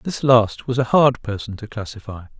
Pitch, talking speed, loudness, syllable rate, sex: 115 Hz, 200 wpm, -19 LUFS, 5.0 syllables/s, male